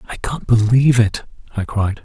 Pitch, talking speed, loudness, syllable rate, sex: 110 Hz, 175 wpm, -17 LUFS, 5.1 syllables/s, male